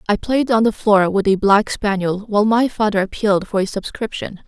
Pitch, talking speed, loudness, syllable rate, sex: 210 Hz, 215 wpm, -17 LUFS, 5.4 syllables/s, female